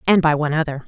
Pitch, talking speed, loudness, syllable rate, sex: 155 Hz, 275 wpm, -18 LUFS, 8.2 syllables/s, female